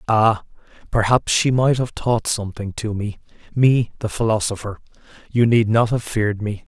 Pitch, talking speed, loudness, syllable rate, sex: 110 Hz, 150 wpm, -20 LUFS, 5.0 syllables/s, male